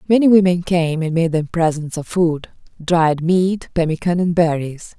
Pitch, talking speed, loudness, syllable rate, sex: 170 Hz, 170 wpm, -17 LUFS, 4.4 syllables/s, female